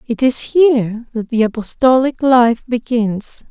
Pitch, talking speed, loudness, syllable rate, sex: 240 Hz, 135 wpm, -15 LUFS, 4.0 syllables/s, female